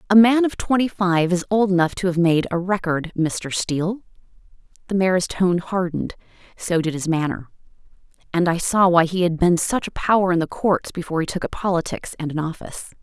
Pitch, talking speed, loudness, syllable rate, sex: 180 Hz, 205 wpm, -20 LUFS, 5.6 syllables/s, female